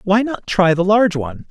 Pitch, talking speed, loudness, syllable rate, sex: 190 Hz, 240 wpm, -16 LUFS, 5.7 syllables/s, male